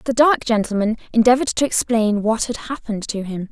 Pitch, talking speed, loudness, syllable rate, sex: 230 Hz, 190 wpm, -19 LUFS, 5.7 syllables/s, female